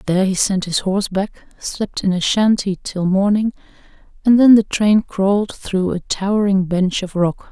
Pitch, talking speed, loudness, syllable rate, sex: 195 Hz, 185 wpm, -17 LUFS, 4.6 syllables/s, female